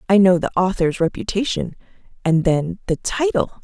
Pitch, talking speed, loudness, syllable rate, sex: 190 Hz, 150 wpm, -19 LUFS, 5.2 syllables/s, female